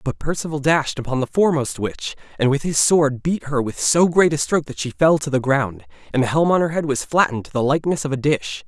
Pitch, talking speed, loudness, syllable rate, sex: 145 Hz, 265 wpm, -19 LUFS, 6.1 syllables/s, male